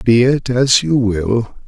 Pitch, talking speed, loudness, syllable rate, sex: 120 Hz, 180 wpm, -15 LUFS, 3.3 syllables/s, male